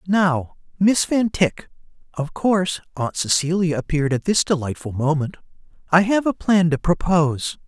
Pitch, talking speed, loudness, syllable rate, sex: 170 Hz, 150 wpm, -20 LUFS, 2.5 syllables/s, male